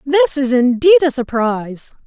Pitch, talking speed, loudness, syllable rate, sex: 270 Hz, 145 wpm, -14 LUFS, 4.3 syllables/s, female